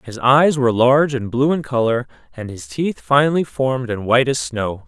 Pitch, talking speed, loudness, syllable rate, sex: 130 Hz, 210 wpm, -17 LUFS, 5.3 syllables/s, male